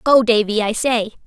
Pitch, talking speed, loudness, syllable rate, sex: 225 Hz, 190 wpm, -17 LUFS, 5.1 syllables/s, female